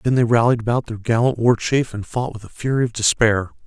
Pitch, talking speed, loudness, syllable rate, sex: 115 Hz, 245 wpm, -19 LUFS, 5.8 syllables/s, male